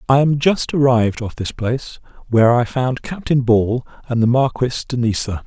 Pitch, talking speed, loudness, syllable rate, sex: 125 Hz, 185 wpm, -18 LUFS, 5.2 syllables/s, male